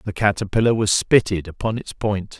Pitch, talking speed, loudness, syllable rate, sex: 100 Hz, 175 wpm, -20 LUFS, 5.1 syllables/s, male